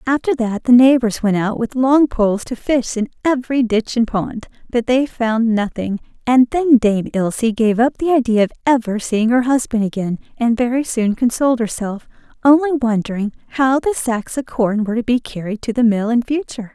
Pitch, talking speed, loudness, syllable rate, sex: 235 Hz, 195 wpm, -17 LUFS, 5.2 syllables/s, female